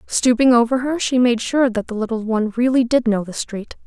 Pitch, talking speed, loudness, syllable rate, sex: 240 Hz, 235 wpm, -18 LUFS, 5.5 syllables/s, female